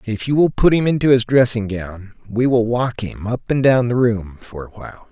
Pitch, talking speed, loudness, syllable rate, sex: 115 Hz, 245 wpm, -17 LUFS, 5.0 syllables/s, male